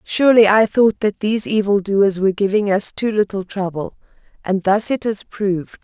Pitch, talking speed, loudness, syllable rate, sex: 205 Hz, 185 wpm, -17 LUFS, 5.2 syllables/s, female